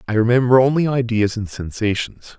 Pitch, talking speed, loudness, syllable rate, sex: 115 Hz, 150 wpm, -18 LUFS, 5.4 syllables/s, male